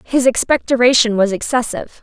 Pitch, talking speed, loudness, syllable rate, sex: 240 Hz, 120 wpm, -15 LUFS, 5.7 syllables/s, female